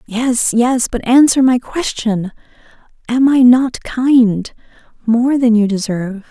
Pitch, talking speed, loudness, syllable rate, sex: 240 Hz, 125 wpm, -13 LUFS, 3.8 syllables/s, female